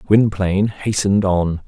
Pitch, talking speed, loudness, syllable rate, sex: 100 Hz, 110 wpm, -17 LUFS, 4.7 syllables/s, male